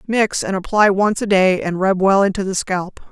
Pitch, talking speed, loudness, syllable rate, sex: 195 Hz, 230 wpm, -17 LUFS, 4.8 syllables/s, female